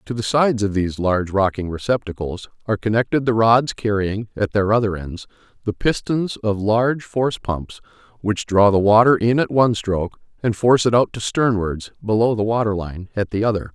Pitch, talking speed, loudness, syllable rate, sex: 105 Hz, 190 wpm, -19 LUFS, 5.5 syllables/s, male